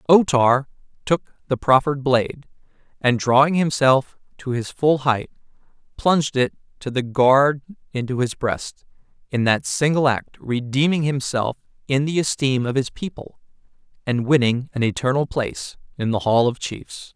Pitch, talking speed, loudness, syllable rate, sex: 135 Hz, 150 wpm, -20 LUFS, 4.6 syllables/s, male